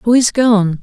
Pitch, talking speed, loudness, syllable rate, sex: 220 Hz, 215 wpm, -12 LUFS, 3.8 syllables/s, female